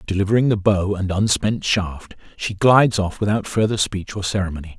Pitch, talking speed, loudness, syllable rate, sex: 100 Hz, 175 wpm, -19 LUFS, 5.4 syllables/s, male